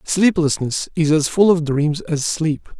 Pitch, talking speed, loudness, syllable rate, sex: 160 Hz, 170 wpm, -18 LUFS, 3.8 syllables/s, male